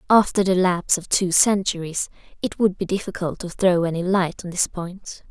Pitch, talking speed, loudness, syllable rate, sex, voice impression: 180 Hz, 190 wpm, -21 LUFS, 5.1 syllables/s, female, feminine, adult-like, relaxed, weak, soft, raspy, calm, slightly friendly, reassuring, kind, modest